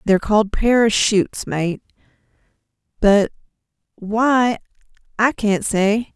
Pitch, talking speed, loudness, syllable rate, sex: 215 Hz, 90 wpm, -18 LUFS, 3.6 syllables/s, female